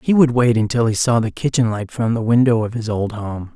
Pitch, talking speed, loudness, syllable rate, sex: 115 Hz, 270 wpm, -18 LUFS, 5.5 syllables/s, male